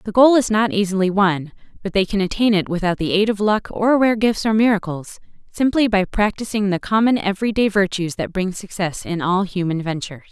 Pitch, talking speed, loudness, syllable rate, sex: 200 Hz, 200 wpm, -19 LUFS, 5.6 syllables/s, female